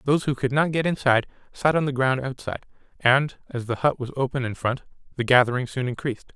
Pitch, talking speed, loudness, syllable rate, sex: 130 Hz, 215 wpm, -23 LUFS, 6.4 syllables/s, male